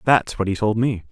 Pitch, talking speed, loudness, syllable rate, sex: 105 Hz, 270 wpm, -21 LUFS, 5.4 syllables/s, male